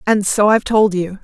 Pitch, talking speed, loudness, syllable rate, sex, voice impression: 205 Hz, 245 wpm, -14 LUFS, 5.5 syllables/s, female, very feminine, slightly young, slightly adult-like, thin, tensed, powerful, very bright, very hard, very clear, very fluent, slightly cute, slightly cool, intellectual, very refreshing, sincere, slightly calm, friendly, reassuring, unique, elegant, slightly wild, sweet, very lively, strict, intense, slightly sharp